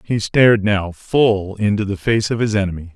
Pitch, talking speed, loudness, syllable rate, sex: 105 Hz, 205 wpm, -17 LUFS, 5.0 syllables/s, male